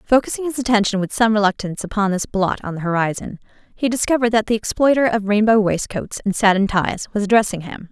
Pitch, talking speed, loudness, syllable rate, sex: 210 Hz, 195 wpm, -18 LUFS, 6.2 syllables/s, female